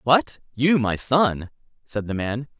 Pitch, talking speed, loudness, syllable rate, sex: 125 Hz, 160 wpm, -22 LUFS, 3.6 syllables/s, male